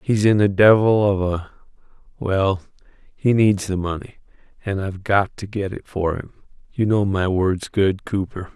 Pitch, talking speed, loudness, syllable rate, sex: 100 Hz, 170 wpm, -20 LUFS, 4.5 syllables/s, male